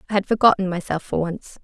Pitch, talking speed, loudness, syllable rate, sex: 185 Hz, 220 wpm, -21 LUFS, 6.3 syllables/s, female